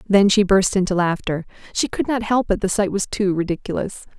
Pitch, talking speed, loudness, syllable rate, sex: 195 Hz, 215 wpm, -20 LUFS, 5.5 syllables/s, female